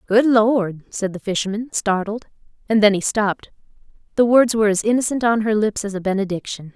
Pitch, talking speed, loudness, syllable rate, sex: 210 Hz, 180 wpm, -19 LUFS, 5.6 syllables/s, female